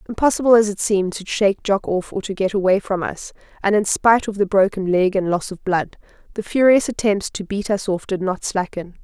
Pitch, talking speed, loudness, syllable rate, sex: 200 Hz, 230 wpm, -19 LUFS, 5.7 syllables/s, female